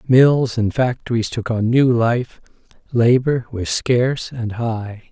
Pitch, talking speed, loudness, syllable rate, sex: 120 Hz, 140 wpm, -18 LUFS, 3.7 syllables/s, male